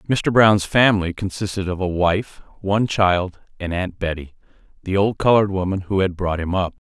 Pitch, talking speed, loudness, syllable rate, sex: 95 Hz, 185 wpm, -19 LUFS, 5.1 syllables/s, male